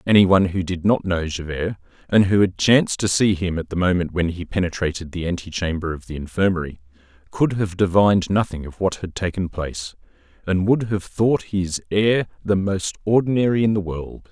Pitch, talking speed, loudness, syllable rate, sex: 95 Hz, 195 wpm, -21 LUFS, 5.4 syllables/s, male